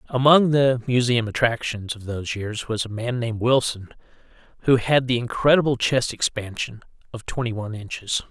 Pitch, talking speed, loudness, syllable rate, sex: 120 Hz, 160 wpm, -22 LUFS, 5.3 syllables/s, male